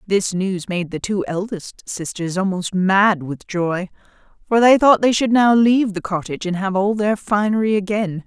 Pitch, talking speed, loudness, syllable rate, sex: 195 Hz, 190 wpm, -18 LUFS, 4.6 syllables/s, female